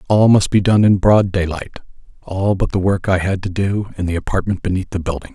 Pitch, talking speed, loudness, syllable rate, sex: 95 Hz, 225 wpm, -17 LUFS, 5.6 syllables/s, male